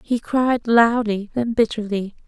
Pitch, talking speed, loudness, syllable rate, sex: 225 Hz, 130 wpm, -20 LUFS, 3.9 syllables/s, female